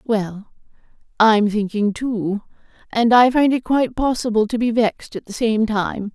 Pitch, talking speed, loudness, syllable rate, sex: 225 Hz, 165 wpm, -18 LUFS, 4.5 syllables/s, female